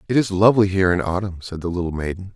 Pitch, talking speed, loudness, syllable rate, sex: 95 Hz, 255 wpm, -20 LUFS, 7.6 syllables/s, male